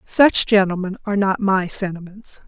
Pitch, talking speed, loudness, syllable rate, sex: 195 Hz, 145 wpm, -18 LUFS, 4.9 syllables/s, female